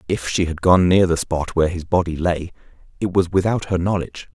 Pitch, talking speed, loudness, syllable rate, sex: 90 Hz, 220 wpm, -19 LUFS, 5.7 syllables/s, male